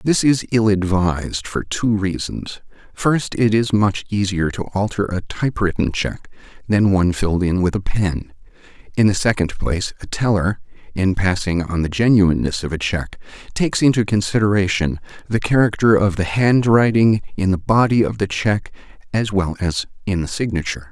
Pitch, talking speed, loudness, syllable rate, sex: 100 Hz, 165 wpm, -18 LUFS, 5.1 syllables/s, male